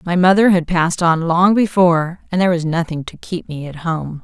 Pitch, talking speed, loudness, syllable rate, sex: 170 Hz, 225 wpm, -16 LUFS, 5.5 syllables/s, female